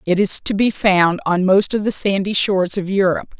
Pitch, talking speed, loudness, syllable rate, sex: 195 Hz, 230 wpm, -17 LUFS, 5.3 syllables/s, female